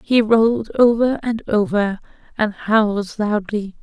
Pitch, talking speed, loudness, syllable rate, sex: 215 Hz, 125 wpm, -18 LUFS, 4.2 syllables/s, female